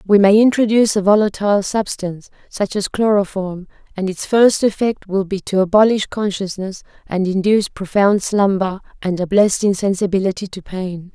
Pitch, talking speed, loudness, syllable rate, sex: 195 Hz, 150 wpm, -17 LUFS, 5.2 syllables/s, female